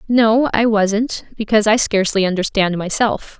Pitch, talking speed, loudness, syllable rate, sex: 210 Hz, 140 wpm, -16 LUFS, 4.9 syllables/s, female